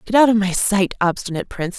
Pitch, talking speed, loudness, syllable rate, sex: 200 Hz, 235 wpm, -18 LUFS, 6.8 syllables/s, female